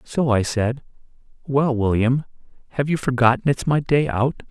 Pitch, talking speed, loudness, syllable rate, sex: 130 Hz, 160 wpm, -20 LUFS, 4.8 syllables/s, male